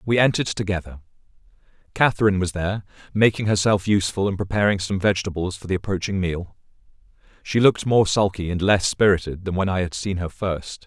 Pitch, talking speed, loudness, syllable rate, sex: 95 Hz, 170 wpm, -21 LUFS, 6.2 syllables/s, male